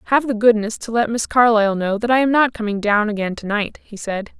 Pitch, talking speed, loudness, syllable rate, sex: 220 Hz, 260 wpm, -18 LUFS, 5.9 syllables/s, female